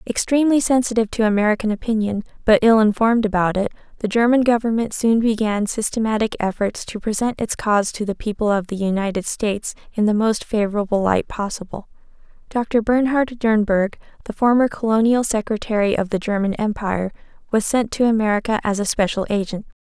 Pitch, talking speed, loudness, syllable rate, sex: 215 Hz, 160 wpm, -19 LUFS, 5.9 syllables/s, female